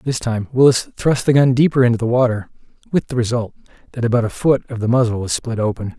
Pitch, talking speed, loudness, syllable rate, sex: 120 Hz, 230 wpm, -17 LUFS, 6.1 syllables/s, male